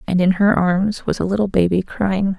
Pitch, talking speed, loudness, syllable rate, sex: 190 Hz, 225 wpm, -18 LUFS, 4.9 syllables/s, female